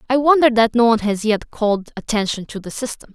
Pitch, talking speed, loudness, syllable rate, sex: 230 Hz, 230 wpm, -18 LUFS, 6.2 syllables/s, female